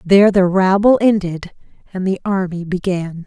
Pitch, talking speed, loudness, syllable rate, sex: 190 Hz, 145 wpm, -16 LUFS, 4.7 syllables/s, female